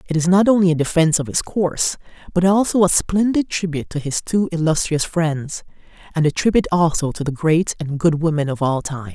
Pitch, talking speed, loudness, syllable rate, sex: 165 Hz, 210 wpm, -18 LUFS, 5.7 syllables/s, female